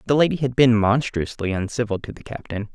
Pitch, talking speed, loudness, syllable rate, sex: 115 Hz, 195 wpm, -21 LUFS, 5.9 syllables/s, male